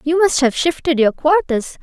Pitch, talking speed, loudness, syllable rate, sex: 300 Hz, 200 wpm, -16 LUFS, 4.7 syllables/s, female